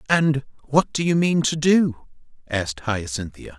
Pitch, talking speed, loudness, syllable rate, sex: 135 Hz, 150 wpm, -21 LUFS, 4.3 syllables/s, male